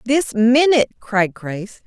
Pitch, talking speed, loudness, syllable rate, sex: 235 Hz, 130 wpm, -16 LUFS, 4.6 syllables/s, female